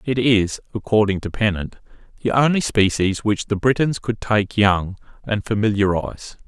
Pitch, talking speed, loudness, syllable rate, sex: 105 Hz, 150 wpm, -20 LUFS, 4.7 syllables/s, male